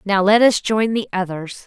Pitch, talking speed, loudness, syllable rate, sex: 200 Hz, 215 wpm, -17 LUFS, 4.6 syllables/s, female